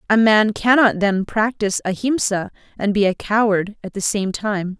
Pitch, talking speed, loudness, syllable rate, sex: 210 Hz, 175 wpm, -18 LUFS, 4.7 syllables/s, female